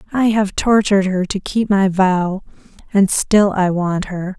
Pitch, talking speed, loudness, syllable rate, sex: 195 Hz, 180 wpm, -16 LUFS, 4.1 syllables/s, female